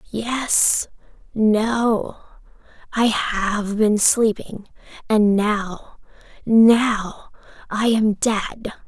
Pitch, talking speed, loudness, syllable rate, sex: 215 Hz, 45 wpm, -19 LUFS, 2.3 syllables/s, female